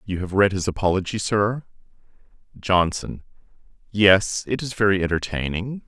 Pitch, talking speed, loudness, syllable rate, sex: 100 Hz, 120 wpm, -21 LUFS, 4.8 syllables/s, male